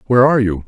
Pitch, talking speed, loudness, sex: 110 Hz, 265 wpm, -14 LUFS, male